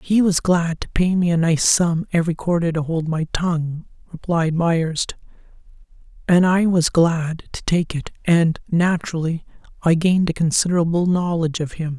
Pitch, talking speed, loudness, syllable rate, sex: 170 Hz, 165 wpm, -19 LUFS, 4.9 syllables/s, male